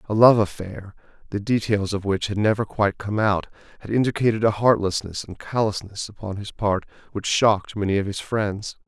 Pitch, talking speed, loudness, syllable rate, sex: 105 Hz, 180 wpm, -22 LUFS, 5.4 syllables/s, male